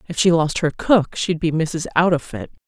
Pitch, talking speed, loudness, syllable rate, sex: 160 Hz, 200 wpm, -19 LUFS, 4.9 syllables/s, female